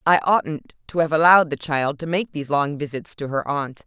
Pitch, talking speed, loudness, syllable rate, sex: 155 Hz, 235 wpm, -21 LUFS, 5.3 syllables/s, female